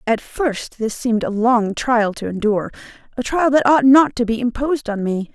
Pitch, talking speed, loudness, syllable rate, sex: 235 Hz, 215 wpm, -18 LUFS, 5.1 syllables/s, female